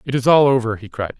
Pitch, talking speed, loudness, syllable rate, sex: 125 Hz, 305 wpm, -16 LUFS, 6.5 syllables/s, male